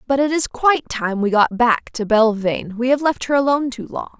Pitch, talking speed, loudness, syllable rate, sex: 245 Hz, 245 wpm, -18 LUFS, 5.7 syllables/s, female